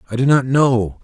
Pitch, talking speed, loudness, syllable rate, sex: 125 Hz, 230 wpm, -15 LUFS, 4.9 syllables/s, male